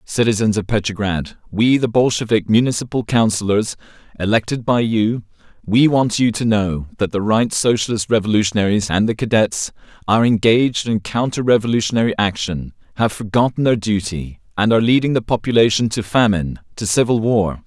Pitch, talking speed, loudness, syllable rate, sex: 110 Hz, 145 wpm, -17 LUFS, 5.5 syllables/s, male